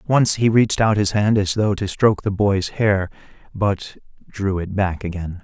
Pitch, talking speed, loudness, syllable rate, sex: 100 Hz, 200 wpm, -19 LUFS, 4.6 syllables/s, male